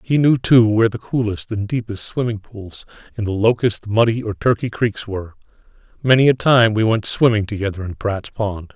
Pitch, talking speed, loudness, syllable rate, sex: 110 Hz, 190 wpm, -18 LUFS, 5.2 syllables/s, male